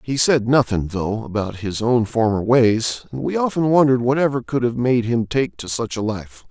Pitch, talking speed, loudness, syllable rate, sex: 120 Hz, 210 wpm, -19 LUFS, 5.0 syllables/s, male